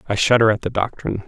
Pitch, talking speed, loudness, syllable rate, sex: 110 Hz, 235 wpm, -18 LUFS, 7.3 syllables/s, male